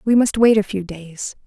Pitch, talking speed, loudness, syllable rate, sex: 205 Hz, 245 wpm, -17 LUFS, 4.7 syllables/s, female